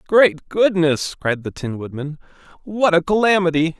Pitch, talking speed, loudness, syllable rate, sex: 170 Hz, 140 wpm, -18 LUFS, 4.5 syllables/s, male